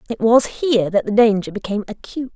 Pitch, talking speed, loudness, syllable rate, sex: 220 Hz, 205 wpm, -17 LUFS, 6.6 syllables/s, female